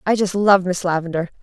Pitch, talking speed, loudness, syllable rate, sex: 185 Hz, 210 wpm, -18 LUFS, 5.7 syllables/s, female